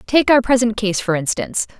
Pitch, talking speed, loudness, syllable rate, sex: 225 Hz, 200 wpm, -17 LUFS, 5.8 syllables/s, female